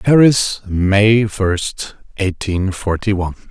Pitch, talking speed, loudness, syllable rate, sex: 100 Hz, 105 wpm, -16 LUFS, 3.2 syllables/s, male